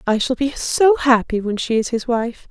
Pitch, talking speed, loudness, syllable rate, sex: 245 Hz, 240 wpm, -18 LUFS, 4.8 syllables/s, female